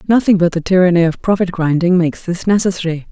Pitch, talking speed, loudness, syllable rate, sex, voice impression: 180 Hz, 195 wpm, -14 LUFS, 6.5 syllables/s, female, feminine, middle-aged, slightly weak, soft, fluent, raspy, intellectual, calm, slightly reassuring, elegant, kind